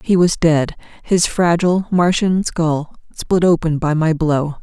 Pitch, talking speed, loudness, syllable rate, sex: 165 Hz, 155 wpm, -16 LUFS, 4.0 syllables/s, female